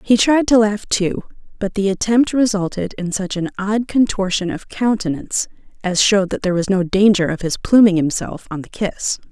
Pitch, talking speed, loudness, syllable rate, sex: 200 Hz, 195 wpm, -17 LUFS, 5.2 syllables/s, female